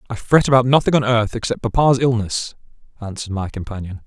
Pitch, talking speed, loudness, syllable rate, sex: 115 Hz, 175 wpm, -18 LUFS, 6.2 syllables/s, male